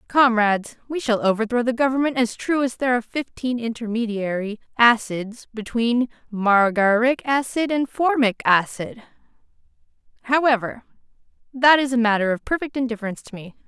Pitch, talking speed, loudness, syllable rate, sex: 235 Hz, 130 wpm, -21 LUFS, 5.3 syllables/s, female